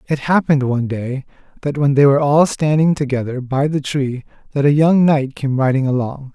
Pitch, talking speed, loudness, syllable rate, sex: 140 Hz, 200 wpm, -16 LUFS, 5.4 syllables/s, male